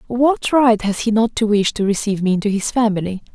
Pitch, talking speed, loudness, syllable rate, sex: 215 Hz, 235 wpm, -17 LUFS, 5.9 syllables/s, female